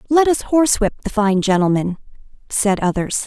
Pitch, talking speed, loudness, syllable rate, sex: 220 Hz, 145 wpm, -17 LUFS, 5.3 syllables/s, female